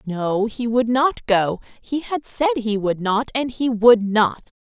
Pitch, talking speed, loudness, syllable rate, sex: 235 Hz, 195 wpm, -20 LUFS, 3.7 syllables/s, female